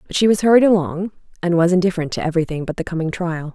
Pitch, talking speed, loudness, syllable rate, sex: 175 Hz, 235 wpm, -18 LUFS, 7.4 syllables/s, female